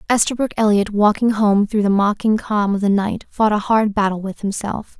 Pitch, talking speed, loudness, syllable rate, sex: 210 Hz, 205 wpm, -18 LUFS, 5.1 syllables/s, female